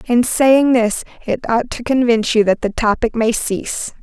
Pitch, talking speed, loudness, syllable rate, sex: 235 Hz, 195 wpm, -16 LUFS, 4.7 syllables/s, female